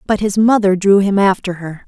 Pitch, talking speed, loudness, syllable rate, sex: 195 Hz, 225 wpm, -14 LUFS, 5.1 syllables/s, female